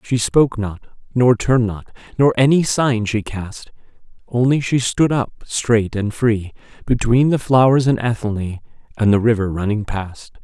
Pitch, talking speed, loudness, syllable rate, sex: 115 Hz, 160 wpm, -18 LUFS, 4.6 syllables/s, male